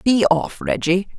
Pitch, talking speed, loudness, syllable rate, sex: 170 Hz, 150 wpm, -19 LUFS, 3.9 syllables/s, female